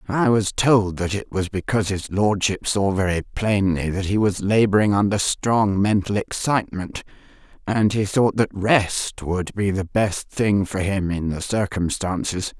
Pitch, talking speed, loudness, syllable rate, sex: 100 Hz, 165 wpm, -21 LUFS, 4.3 syllables/s, female